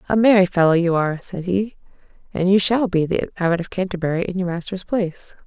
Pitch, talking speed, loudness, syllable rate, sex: 185 Hz, 210 wpm, -20 LUFS, 6.2 syllables/s, female